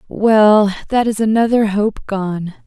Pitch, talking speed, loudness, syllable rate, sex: 210 Hz, 135 wpm, -15 LUFS, 3.6 syllables/s, female